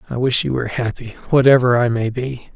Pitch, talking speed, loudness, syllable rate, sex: 125 Hz, 210 wpm, -17 LUFS, 5.5 syllables/s, male